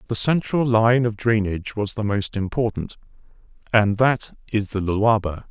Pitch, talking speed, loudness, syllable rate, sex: 110 Hz, 155 wpm, -21 LUFS, 5.0 syllables/s, male